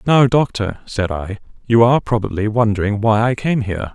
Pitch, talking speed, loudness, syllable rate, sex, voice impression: 110 Hz, 185 wpm, -17 LUFS, 5.4 syllables/s, male, masculine, very adult-like, cool, calm, slightly mature, sweet